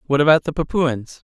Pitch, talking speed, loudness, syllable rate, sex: 145 Hz, 180 wpm, -18 LUFS, 5.6 syllables/s, male